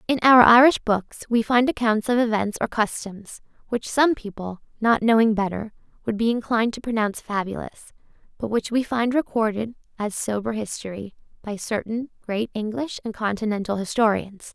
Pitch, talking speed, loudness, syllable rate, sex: 220 Hz, 150 wpm, -22 LUFS, 5.1 syllables/s, female